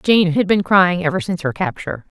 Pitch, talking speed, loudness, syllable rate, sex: 185 Hz, 220 wpm, -17 LUFS, 5.9 syllables/s, female